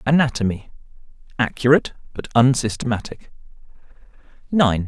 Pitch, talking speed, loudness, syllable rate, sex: 125 Hz, 50 wpm, -19 LUFS, 5.8 syllables/s, male